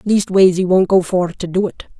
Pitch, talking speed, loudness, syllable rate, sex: 185 Hz, 240 wpm, -15 LUFS, 5.1 syllables/s, female